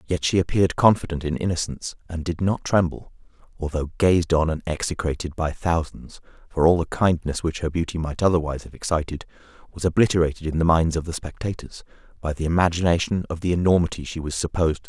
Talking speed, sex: 195 wpm, male